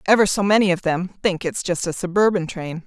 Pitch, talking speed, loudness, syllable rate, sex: 185 Hz, 230 wpm, -20 LUFS, 5.5 syllables/s, female